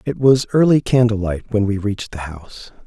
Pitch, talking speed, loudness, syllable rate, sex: 110 Hz, 210 wpm, -17 LUFS, 5.5 syllables/s, male